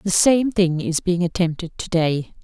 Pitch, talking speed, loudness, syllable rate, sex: 180 Hz, 195 wpm, -20 LUFS, 4.3 syllables/s, female